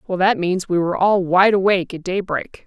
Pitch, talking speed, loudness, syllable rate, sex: 185 Hz, 225 wpm, -18 LUFS, 5.6 syllables/s, female